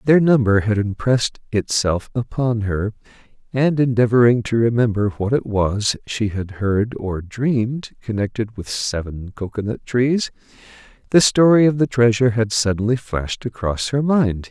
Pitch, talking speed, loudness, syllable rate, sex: 115 Hz, 150 wpm, -19 LUFS, 4.6 syllables/s, male